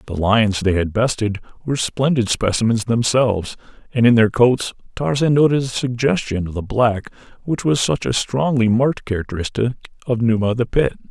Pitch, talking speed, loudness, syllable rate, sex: 115 Hz, 175 wpm, -18 LUFS, 5.4 syllables/s, male